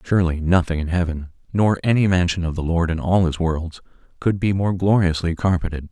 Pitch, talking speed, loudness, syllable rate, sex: 90 Hz, 195 wpm, -20 LUFS, 5.6 syllables/s, male